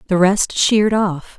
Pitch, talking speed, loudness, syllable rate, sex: 195 Hz, 175 wpm, -16 LUFS, 4.2 syllables/s, female